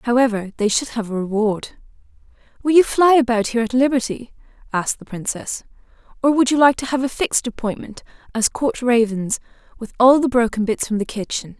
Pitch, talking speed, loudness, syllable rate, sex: 240 Hz, 185 wpm, -19 LUFS, 5.7 syllables/s, female